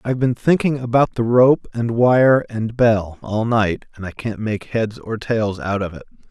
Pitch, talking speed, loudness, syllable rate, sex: 115 Hz, 210 wpm, -18 LUFS, 4.4 syllables/s, male